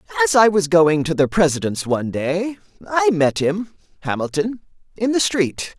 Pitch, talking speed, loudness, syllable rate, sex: 180 Hz, 165 wpm, -19 LUFS, 5.0 syllables/s, male